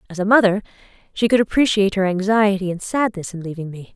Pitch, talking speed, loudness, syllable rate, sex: 200 Hz, 195 wpm, -18 LUFS, 6.5 syllables/s, female